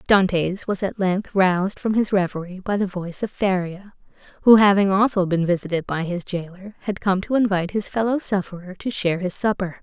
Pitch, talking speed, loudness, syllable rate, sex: 190 Hz, 195 wpm, -21 LUFS, 5.6 syllables/s, female